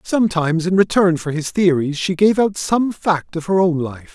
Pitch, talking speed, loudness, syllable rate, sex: 175 Hz, 215 wpm, -17 LUFS, 4.9 syllables/s, male